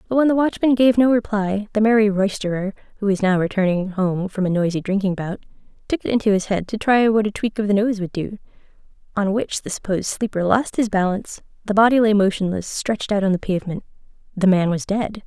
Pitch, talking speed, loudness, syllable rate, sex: 205 Hz, 220 wpm, -20 LUFS, 6.0 syllables/s, female